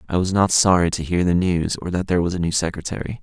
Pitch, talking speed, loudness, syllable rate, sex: 90 Hz, 280 wpm, -20 LUFS, 6.6 syllables/s, male